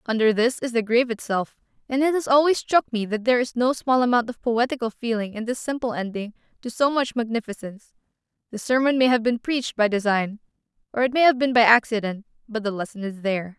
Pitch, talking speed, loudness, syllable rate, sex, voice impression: 235 Hz, 215 wpm, -22 LUFS, 6.2 syllables/s, female, feminine, adult-like, tensed, clear, slightly cool, intellectual, refreshing, lively